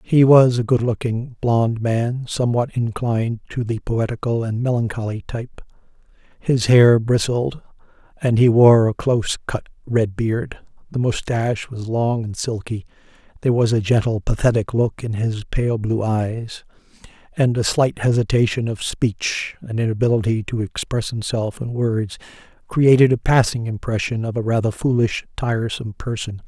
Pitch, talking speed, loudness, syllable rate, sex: 115 Hz, 150 wpm, -20 LUFS, 4.7 syllables/s, male